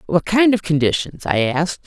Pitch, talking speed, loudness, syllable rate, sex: 175 Hz, 195 wpm, -18 LUFS, 5.4 syllables/s, female